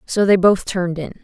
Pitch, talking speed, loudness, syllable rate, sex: 185 Hz, 245 wpm, -17 LUFS, 5.8 syllables/s, female